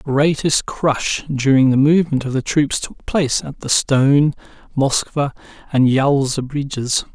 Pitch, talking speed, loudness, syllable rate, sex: 140 Hz, 150 wpm, -17 LUFS, 4.4 syllables/s, male